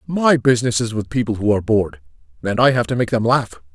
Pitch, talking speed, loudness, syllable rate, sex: 110 Hz, 240 wpm, -18 LUFS, 6.6 syllables/s, male